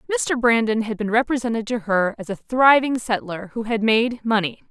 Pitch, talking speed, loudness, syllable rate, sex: 230 Hz, 190 wpm, -20 LUFS, 5.3 syllables/s, female